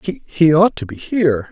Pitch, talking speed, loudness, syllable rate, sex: 160 Hz, 200 wpm, -15 LUFS, 5.1 syllables/s, male